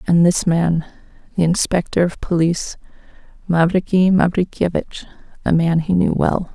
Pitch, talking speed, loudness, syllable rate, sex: 170 Hz, 120 wpm, -18 LUFS, 4.8 syllables/s, female